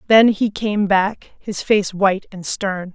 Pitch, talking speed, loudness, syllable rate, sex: 200 Hz, 185 wpm, -18 LUFS, 3.8 syllables/s, female